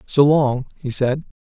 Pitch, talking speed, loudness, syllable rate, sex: 135 Hz, 170 wpm, -19 LUFS, 4.0 syllables/s, male